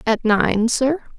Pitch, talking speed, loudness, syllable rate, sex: 240 Hz, 150 wpm, -18 LUFS, 3.3 syllables/s, female